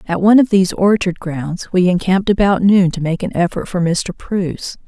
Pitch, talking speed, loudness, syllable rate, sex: 185 Hz, 210 wpm, -15 LUFS, 5.2 syllables/s, female